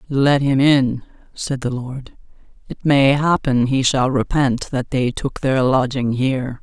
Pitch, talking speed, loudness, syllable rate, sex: 130 Hz, 165 wpm, -18 LUFS, 3.9 syllables/s, female